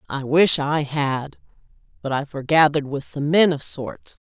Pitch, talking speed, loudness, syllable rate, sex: 145 Hz, 170 wpm, -20 LUFS, 4.5 syllables/s, female